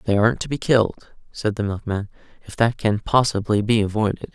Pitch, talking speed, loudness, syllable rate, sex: 110 Hz, 195 wpm, -21 LUFS, 5.7 syllables/s, male